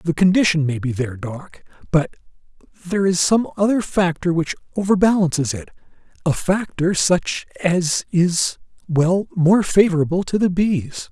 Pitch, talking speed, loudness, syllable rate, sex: 175 Hz, 135 wpm, -19 LUFS, 4.6 syllables/s, male